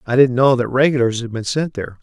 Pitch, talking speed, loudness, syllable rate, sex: 125 Hz, 265 wpm, -17 LUFS, 6.4 syllables/s, male